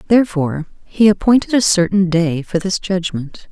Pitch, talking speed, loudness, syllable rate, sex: 185 Hz, 155 wpm, -15 LUFS, 5.1 syllables/s, female